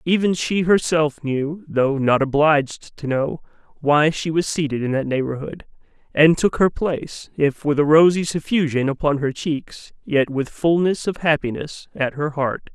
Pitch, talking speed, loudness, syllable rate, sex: 150 Hz, 170 wpm, -20 LUFS, 4.5 syllables/s, male